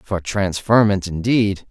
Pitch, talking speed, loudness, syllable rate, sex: 100 Hz, 105 wpm, -18 LUFS, 3.6 syllables/s, male